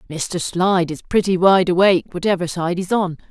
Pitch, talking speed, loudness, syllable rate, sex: 180 Hz, 180 wpm, -18 LUFS, 5.4 syllables/s, female